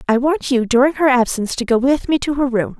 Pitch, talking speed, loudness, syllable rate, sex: 260 Hz, 280 wpm, -16 LUFS, 6.1 syllables/s, female